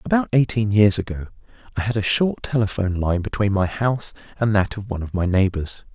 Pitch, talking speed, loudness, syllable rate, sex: 105 Hz, 200 wpm, -21 LUFS, 6.0 syllables/s, male